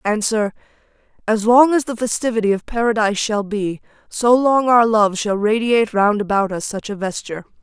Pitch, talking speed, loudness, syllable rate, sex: 215 Hz, 175 wpm, -17 LUFS, 5.3 syllables/s, female